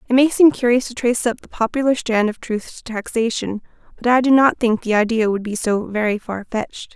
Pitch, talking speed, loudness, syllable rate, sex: 230 Hz, 235 wpm, -18 LUFS, 5.8 syllables/s, female